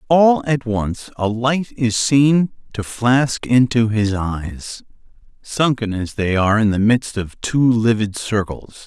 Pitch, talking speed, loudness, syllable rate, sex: 115 Hz, 150 wpm, -18 LUFS, 3.6 syllables/s, male